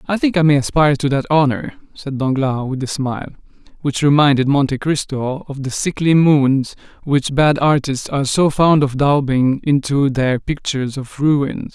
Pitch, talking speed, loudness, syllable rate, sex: 140 Hz, 175 wpm, -16 LUFS, 4.8 syllables/s, male